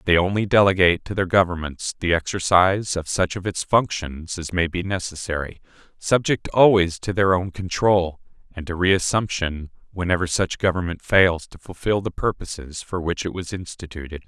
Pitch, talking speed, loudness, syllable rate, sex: 90 Hz, 165 wpm, -21 LUFS, 5.1 syllables/s, male